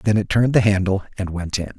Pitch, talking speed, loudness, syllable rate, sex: 100 Hz, 270 wpm, -20 LUFS, 6.7 syllables/s, male